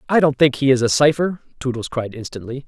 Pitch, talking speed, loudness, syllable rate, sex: 135 Hz, 225 wpm, -18 LUFS, 6.1 syllables/s, male